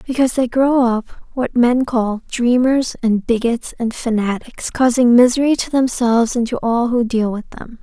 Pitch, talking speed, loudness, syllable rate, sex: 240 Hz, 175 wpm, -16 LUFS, 4.6 syllables/s, female